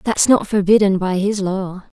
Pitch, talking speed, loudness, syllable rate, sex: 195 Hz, 180 wpm, -16 LUFS, 4.6 syllables/s, female